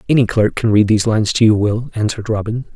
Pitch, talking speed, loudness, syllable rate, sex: 110 Hz, 240 wpm, -15 LUFS, 6.9 syllables/s, male